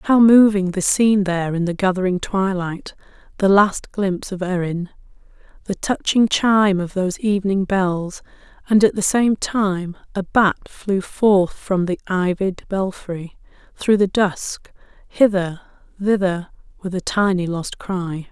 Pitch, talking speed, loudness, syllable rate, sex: 190 Hz, 145 wpm, -19 LUFS, 4.2 syllables/s, female